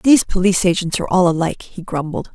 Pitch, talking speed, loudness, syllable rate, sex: 180 Hz, 205 wpm, -17 LUFS, 7.2 syllables/s, female